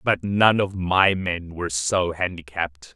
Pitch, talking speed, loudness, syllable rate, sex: 90 Hz, 160 wpm, -22 LUFS, 4.2 syllables/s, male